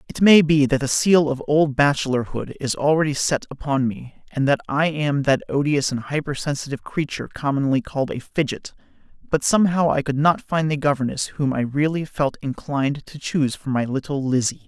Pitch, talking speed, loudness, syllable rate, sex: 140 Hz, 190 wpm, -21 LUFS, 5.5 syllables/s, male